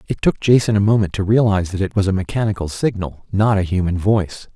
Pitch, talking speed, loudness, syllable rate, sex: 100 Hz, 225 wpm, -18 LUFS, 6.3 syllables/s, male